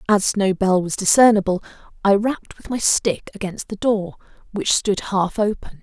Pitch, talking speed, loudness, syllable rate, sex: 200 Hz, 175 wpm, -19 LUFS, 4.8 syllables/s, female